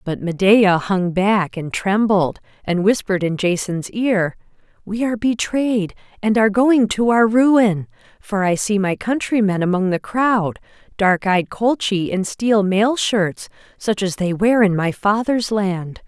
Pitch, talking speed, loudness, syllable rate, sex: 205 Hz, 160 wpm, -18 LUFS, 4.0 syllables/s, female